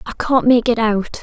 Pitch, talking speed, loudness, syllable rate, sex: 235 Hz, 245 wpm, -15 LUFS, 4.8 syllables/s, female